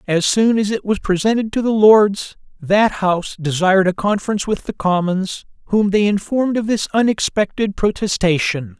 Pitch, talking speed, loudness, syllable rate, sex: 200 Hz, 165 wpm, -17 LUFS, 5.1 syllables/s, male